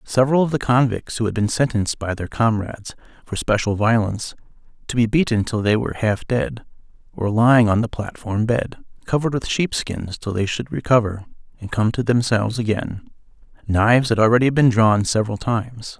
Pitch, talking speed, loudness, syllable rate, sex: 115 Hz, 175 wpm, -20 LUFS, 5.7 syllables/s, male